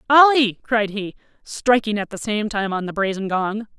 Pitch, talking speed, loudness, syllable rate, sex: 215 Hz, 190 wpm, -20 LUFS, 4.7 syllables/s, female